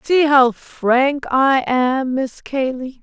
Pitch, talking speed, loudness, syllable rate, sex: 265 Hz, 140 wpm, -17 LUFS, 2.7 syllables/s, female